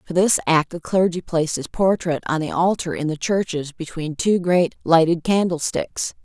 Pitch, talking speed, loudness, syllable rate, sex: 170 Hz, 190 wpm, -20 LUFS, 4.8 syllables/s, female